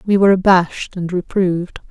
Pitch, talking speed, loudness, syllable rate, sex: 185 Hz, 155 wpm, -16 LUFS, 5.9 syllables/s, female